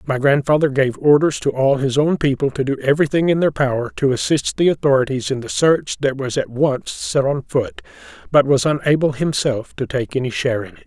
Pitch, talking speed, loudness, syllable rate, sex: 135 Hz, 215 wpm, -18 LUFS, 5.5 syllables/s, male